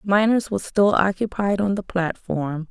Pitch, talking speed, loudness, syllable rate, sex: 190 Hz, 155 wpm, -21 LUFS, 4.2 syllables/s, female